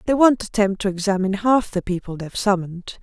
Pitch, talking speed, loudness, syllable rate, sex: 200 Hz, 220 wpm, -20 LUFS, 6.3 syllables/s, female